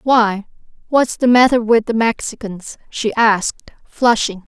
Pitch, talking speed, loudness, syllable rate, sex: 225 Hz, 130 wpm, -16 LUFS, 4.1 syllables/s, female